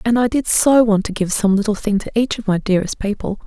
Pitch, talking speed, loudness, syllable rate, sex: 215 Hz, 275 wpm, -17 LUFS, 6.1 syllables/s, female